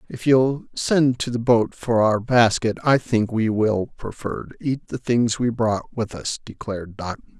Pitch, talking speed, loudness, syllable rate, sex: 115 Hz, 195 wpm, -21 LUFS, 4.2 syllables/s, male